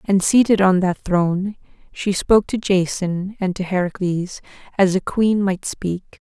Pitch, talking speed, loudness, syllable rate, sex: 190 Hz, 165 wpm, -19 LUFS, 4.3 syllables/s, female